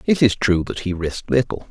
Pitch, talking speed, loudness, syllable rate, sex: 105 Hz, 245 wpm, -20 LUFS, 5.7 syllables/s, male